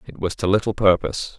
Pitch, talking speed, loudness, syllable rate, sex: 95 Hz, 215 wpm, -20 LUFS, 6.2 syllables/s, male